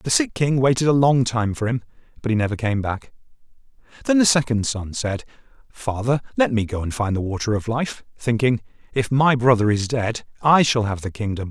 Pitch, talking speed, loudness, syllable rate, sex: 120 Hz, 210 wpm, -21 LUFS, 5.4 syllables/s, male